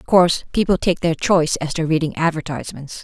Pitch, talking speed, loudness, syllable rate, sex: 165 Hz, 200 wpm, -19 LUFS, 6.2 syllables/s, female